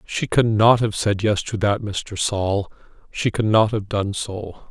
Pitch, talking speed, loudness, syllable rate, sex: 105 Hz, 180 wpm, -20 LUFS, 3.9 syllables/s, male